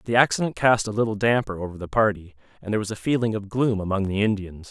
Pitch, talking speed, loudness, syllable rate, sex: 105 Hz, 240 wpm, -23 LUFS, 6.8 syllables/s, male